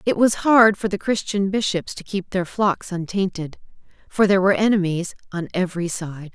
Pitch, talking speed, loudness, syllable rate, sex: 190 Hz, 180 wpm, -20 LUFS, 5.3 syllables/s, female